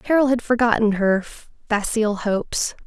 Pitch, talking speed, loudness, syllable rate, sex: 225 Hz, 125 wpm, -20 LUFS, 5.3 syllables/s, female